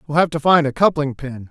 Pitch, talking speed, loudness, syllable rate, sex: 150 Hz, 280 wpm, -17 LUFS, 5.9 syllables/s, male